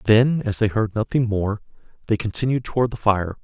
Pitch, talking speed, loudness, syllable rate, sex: 110 Hz, 190 wpm, -21 LUFS, 5.4 syllables/s, male